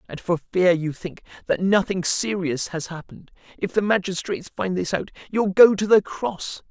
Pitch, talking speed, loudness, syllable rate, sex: 185 Hz, 190 wpm, -22 LUFS, 4.8 syllables/s, male